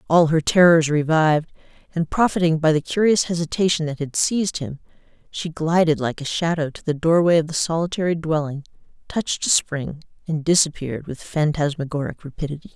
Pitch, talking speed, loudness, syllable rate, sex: 160 Hz, 160 wpm, -20 LUFS, 5.6 syllables/s, female